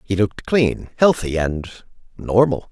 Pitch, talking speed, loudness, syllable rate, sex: 110 Hz, 135 wpm, -19 LUFS, 4.1 syllables/s, male